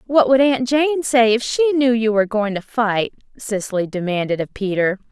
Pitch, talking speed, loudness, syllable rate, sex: 230 Hz, 200 wpm, -18 LUFS, 5.0 syllables/s, female